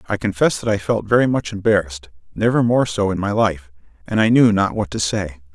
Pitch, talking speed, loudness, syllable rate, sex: 100 Hz, 205 wpm, -18 LUFS, 5.8 syllables/s, male